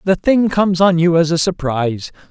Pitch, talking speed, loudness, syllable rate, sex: 170 Hz, 210 wpm, -15 LUFS, 5.4 syllables/s, male